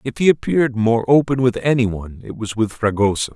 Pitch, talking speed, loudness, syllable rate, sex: 120 Hz, 215 wpm, -18 LUFS, 6.0 syllables/s, male